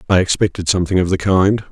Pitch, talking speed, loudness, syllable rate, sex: 95 Hz, 210 wpm, -16 LUFS, 6.7 syllables/s, male